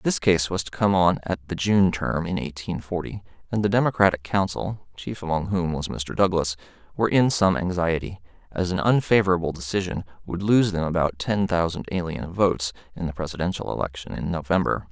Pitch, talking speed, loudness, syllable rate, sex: 90 Hz, 180 wpm, -24 LUFS, 5.6 syllables/s, male